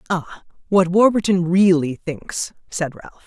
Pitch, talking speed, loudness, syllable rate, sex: 175 Hz, 130 wpm, -19 LUFS, 4.2 syllables/s, female